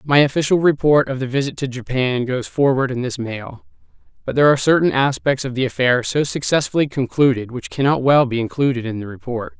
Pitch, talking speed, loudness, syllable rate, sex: 130 Hz, 200 wpm, -18 LUFS, 5.8 syllables/s, male